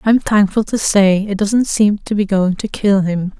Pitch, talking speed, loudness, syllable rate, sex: 205 Hz, 230 wpm, -15 LUFS, 4.3 syllables/s, female